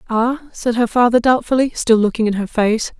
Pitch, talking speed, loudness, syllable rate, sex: 235 Hz, 200 wpm, -16 LUFS, 5.3 syllables/s, female